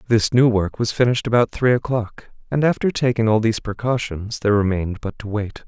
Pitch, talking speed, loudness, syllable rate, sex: 115 Hz, 200 wpm, -20 LUFS, 5.9 syllables/s, male